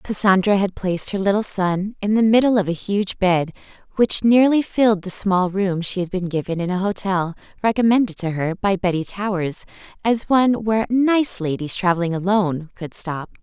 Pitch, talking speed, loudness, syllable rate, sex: 195 Hz, 185 wpm, -20 LUFS, 5.2 syllables/s, female